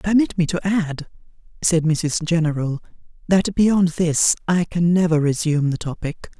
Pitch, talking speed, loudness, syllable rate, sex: 165 Hz, 150 wpm, -20 LUFS, 4.5 syllables/s, female